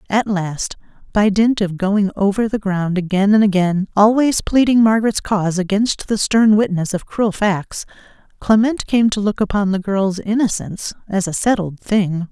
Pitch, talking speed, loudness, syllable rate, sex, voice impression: 200 Hz, 170 wpm, -17 LUFS, 4.7 syllables/s, female, feminine, adult-like, tensed, bright, soft, clear, fluent, intellectual, friendly, unique, elegant, kind, slightly strict